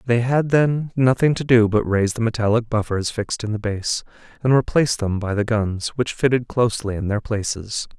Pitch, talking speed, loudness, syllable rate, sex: 115 Hz, 205 wpm, -20 LUFS, 5.3 syllables/s, male